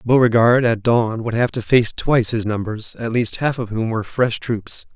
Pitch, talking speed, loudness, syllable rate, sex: 115 Hz, 220 wpm, -18 LUFS, 4.8 syllables/s, male